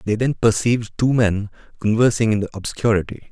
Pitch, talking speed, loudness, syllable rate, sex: 110 Hz, 165 wpm, -19 LUFS, 5.8 syllables/s, male